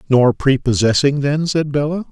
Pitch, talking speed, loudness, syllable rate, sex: 140 Hz, 140 wpm, -16 LUFS, 4.8 syllables/s, male